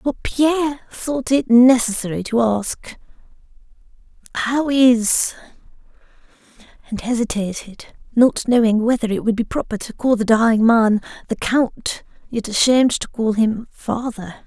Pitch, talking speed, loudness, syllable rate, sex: 235 Hz, 130 wpm, -18 LUFS, 4.4 syllables/s, female